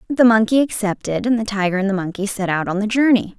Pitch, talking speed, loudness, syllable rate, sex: 210 Hz, 250 wpm, -18 LUFS, 6.2 syllables/s, female